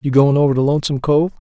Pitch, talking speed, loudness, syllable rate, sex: 140 Hz, 245 wpm, -16 LUFS, 8.0 syllables/s, male